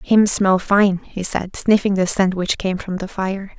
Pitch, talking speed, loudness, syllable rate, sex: 190 Hz, 215 wpm, -18 LUFS, 4.0 syllables/s, female